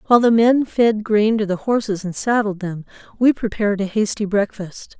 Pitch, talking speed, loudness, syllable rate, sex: 210 Hz, 190 wpm, -18 LUFS, 5.1 syllables/s, female